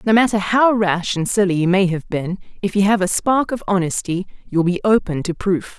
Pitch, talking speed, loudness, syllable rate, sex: 190 Hz, 230 wpm, -18 LUFS, 5.2 syllables/s, female